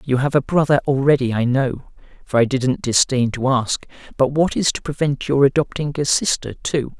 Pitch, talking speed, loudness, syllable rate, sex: 135 Hz, 195 wpm, -19 LUFS, 5.0 syllables/s, male